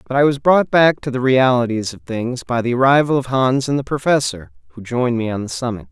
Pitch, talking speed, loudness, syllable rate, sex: 125 Hz, 245 wpm, -17 LUFS, 5.8 syllables/s, male